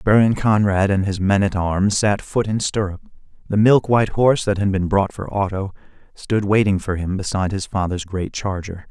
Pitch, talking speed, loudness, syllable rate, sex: 100 Hz, 200 wpm, -19 LUFS, 5.1 syllables/s, male